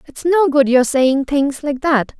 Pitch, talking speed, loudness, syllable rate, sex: 280 Hz, 220 wpm, -15 LUFS, 4.0 syllables/s, female